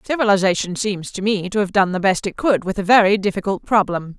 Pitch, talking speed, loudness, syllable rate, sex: 195 Hz, 230 wpm, -18 LUFS, 5.9 syllables/s, female